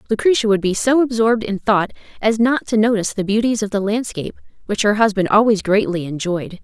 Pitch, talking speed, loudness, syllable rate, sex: 210 Hz, 200 wpm, -17 LUFS, 6.0 syllables/s, female